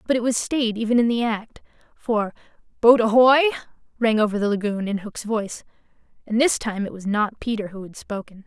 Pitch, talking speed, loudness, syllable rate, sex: 220 Hz, 200 wpm, -21 LUFS, 5.5 syllables/s, female